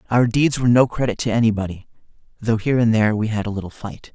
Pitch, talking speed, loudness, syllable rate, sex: 110 Hz, 230 wpm, -19 LUFS, 7.0 syllables/s, male